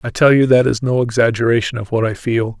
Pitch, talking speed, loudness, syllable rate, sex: 120 Hz, 255 wpm, -15 LUFS, 6.0 syllables/s, male